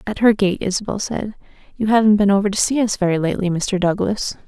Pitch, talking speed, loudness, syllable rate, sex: 200 Hz, 215 wpm, -18 LUFS, 6.1 syllables/s, female